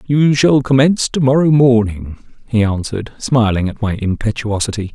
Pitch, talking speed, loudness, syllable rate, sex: 120 Hz, 145 wpm, -15 LUFS, 5.2 syllables/s, male